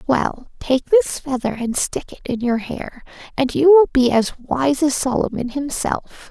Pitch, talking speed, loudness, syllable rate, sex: 260 Hz, 180 wpm, -19 LUFS, 4.1 syllables/s, female